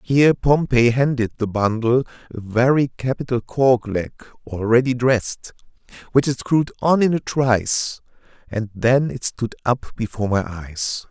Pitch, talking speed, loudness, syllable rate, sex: 120 Hz, 145 wpm, -20 LUFS, 4.6 syllables/s, male